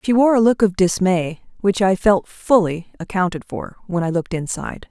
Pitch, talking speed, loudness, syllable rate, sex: 190 Hz, 195 wpm, -19 LUFS, 5.3 syllables/s, female